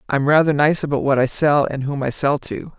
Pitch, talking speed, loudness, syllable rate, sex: 145 Hz, 260 wpm, -18 LUFS, 5.4 syllables/s, female